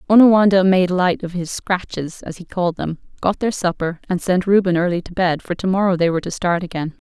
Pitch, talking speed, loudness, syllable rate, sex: 180 Hz, 230 wpm, -18 LUFS, 5.8 syllables/s, female